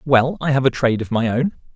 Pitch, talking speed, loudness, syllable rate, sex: 130 Hz, 275 wpm, -19 LUFS, 6.3 syllables/s, male